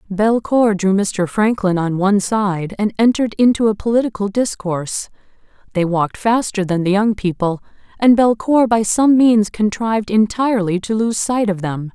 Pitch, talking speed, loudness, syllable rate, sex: 210 Hz, 160 wpm, -16 LUFS, 4.9 syllables/s, female